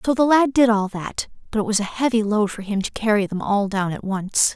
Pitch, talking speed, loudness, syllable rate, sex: 215 Hz, 275 wpm, -21 LUFS, 5.4 syllables/s, female